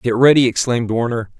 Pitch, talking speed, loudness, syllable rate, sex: 120 Hz, 170 wpm, -16 LUFS, 6.2 syllables/s, male